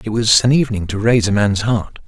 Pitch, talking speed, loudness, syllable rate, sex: 110 Hz, 260 wpm, -15 LUFS, 6.2 syllables/s, male